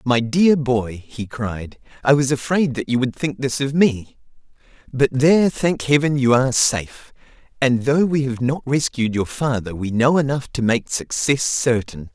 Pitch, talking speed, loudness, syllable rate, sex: 130 Hz, 185 wpm, -19 LUFS, 4.5 syllables/s, male